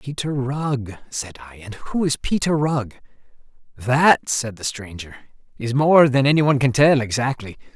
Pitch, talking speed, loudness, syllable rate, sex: 130 Hz, 155 wpm, -19 LUFS, 4.5 syllables/s, male